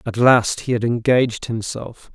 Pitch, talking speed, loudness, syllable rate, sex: 115 Hz, 170 wpm, -18 LUFS, 4.5 syllables/s, male